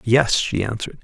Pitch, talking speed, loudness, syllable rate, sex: 115 Hz, 175 wpm, -20 LUFS, 5.5 syllables/s, male